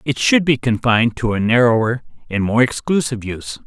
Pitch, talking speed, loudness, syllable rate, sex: 120 Hz, 180 wpm, -17 LUFS, 5.9 syllables/s, male